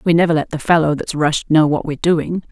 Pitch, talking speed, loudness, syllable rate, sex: 160 Hz, 265 wpm, -16 LUFS, 5.9 syllables/s, female